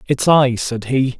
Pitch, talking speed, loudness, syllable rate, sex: 130 Hz, 200 wpm, -16 LUFS, 4.0 syllables/s, male